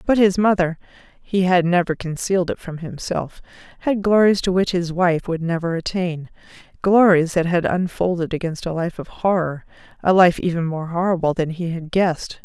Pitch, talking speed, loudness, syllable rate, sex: 175 Hz, 165 wpm, -20 LUFS, 5.1 syllables/s, female